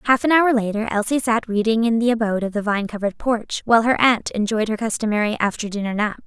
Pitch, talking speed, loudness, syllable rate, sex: 220 Hz, 230 wpm, -20 LUFS, 6.3 syllables/s, female